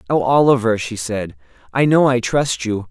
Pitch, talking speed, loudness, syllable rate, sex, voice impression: 115 Hz, 185 wpm, -17 LUFS, 4.7 syllables/s, male, masculine, adult-like, tensed, powerful, slightly dark, clear, slightly raspy, slightly nasal, cool, intellectual, calm, mature, wild, lively, slightly strict, slightly sharp